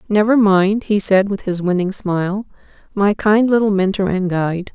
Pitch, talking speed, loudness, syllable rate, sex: 195 Hz, 175 wpm, -16 LUFS, 4.8 syllables/s, female